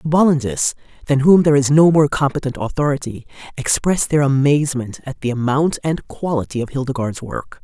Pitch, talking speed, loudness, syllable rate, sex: 140 Hz, 165 wpm, -17 LUFS, 5.5 syllables/s, female